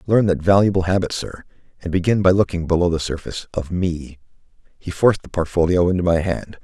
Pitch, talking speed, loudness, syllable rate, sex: 90 Hz, 180 wpm, -19 LUFS, 6.0 syllables/s, male